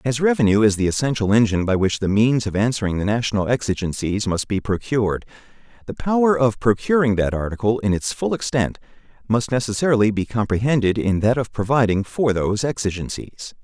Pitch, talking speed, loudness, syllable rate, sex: 110 Hz, 170 wpm, -20 LUFS, 5.9 syllables/s, male